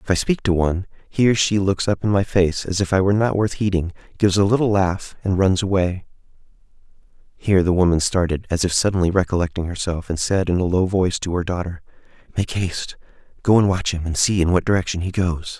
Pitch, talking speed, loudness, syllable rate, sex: 95 Hz, 220 wpm, -20 LUFS, 6.1 syllables/s, male